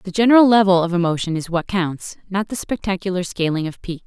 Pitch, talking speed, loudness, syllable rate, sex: 185 Hz, 205 wpm, -18 LUFS, 5.9 syllables/s, female